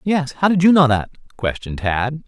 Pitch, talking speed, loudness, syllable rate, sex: 140 Hz, 210 wpm, -18 LUFS, 5.4 syllables/s, male